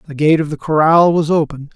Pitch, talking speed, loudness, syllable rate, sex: 155 Hz, 240 wpm, -14 LUFS, 6.4 syllables/s, male